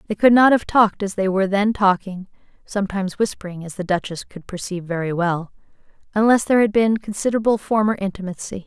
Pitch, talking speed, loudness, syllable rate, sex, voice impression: 200 Hz, 165 wpm, -19 LUFS, 6.4 syllables/s, female, feminine, adult-like, tensed, powerful, bright, clear, fluent, intellectual, elegant, lively, slightly strict